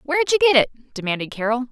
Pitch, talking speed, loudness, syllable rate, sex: 270 Hz, 210 wpm, -19 LUFS, 6.9 syllables/s, female